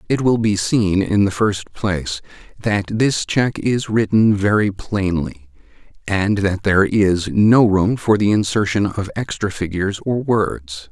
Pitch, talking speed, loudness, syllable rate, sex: 100 Hz, 160 wpm, -18 LUFS, 4.0 syllables/s, male